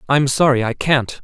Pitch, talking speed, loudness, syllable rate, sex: 135 Hz, 195 wpm, -16 LUFS, 4.7 syllables/s, male